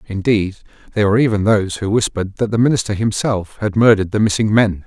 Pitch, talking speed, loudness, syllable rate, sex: 105 Hz, 195 wpm, -16 LUFS, 6.8 syllables/s, male